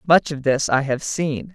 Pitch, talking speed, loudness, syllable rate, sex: 145 Hz, 235 wpm, -20 LUFS, 4.3 syllables/s, female